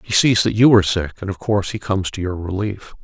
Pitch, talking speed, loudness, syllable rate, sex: 100 Hz, 275 wpm, -18 LUFS, 6.5 syllables/s, male